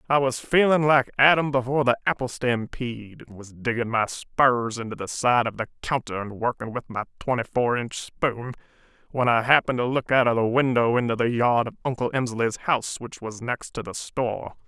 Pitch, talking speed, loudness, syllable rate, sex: 120 Hz, 205 wpm, -24 LUFS, 5.4 syllables/s, male